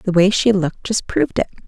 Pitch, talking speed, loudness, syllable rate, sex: 190 Hz, 250 wpm, -18 LUFS, 6.2 syllables/s, female